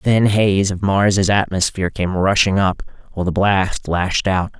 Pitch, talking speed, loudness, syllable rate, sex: 95 Hz, 185 wpm, -17 LUFS, 4.6 syllables/s, male